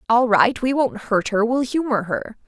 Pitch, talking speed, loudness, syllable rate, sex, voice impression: 225 Hz, 220 wpm, -20 LUFS, 4.5 syllables/s, female, very feminine, adult-like, very thin, tensed, very powerful, bright, slightly soft, very clear, very fluent, cool, intellectual, very refreshing, sincere, slightly calm, friendly, slightly reassuring, unique, elegant, wild, slightly sweet, very lively, strict, intense, slightly sharp, light